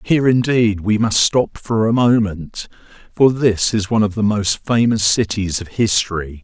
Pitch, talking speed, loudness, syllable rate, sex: 105 Hz, 175 wpm, -16 LUFS, 4.6 syllables/s, male